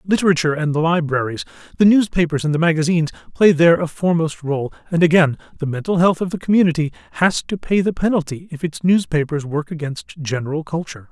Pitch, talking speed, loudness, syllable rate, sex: 165 Hz, 185 wpm, -18 LUFS, 6.4 syllables/s, male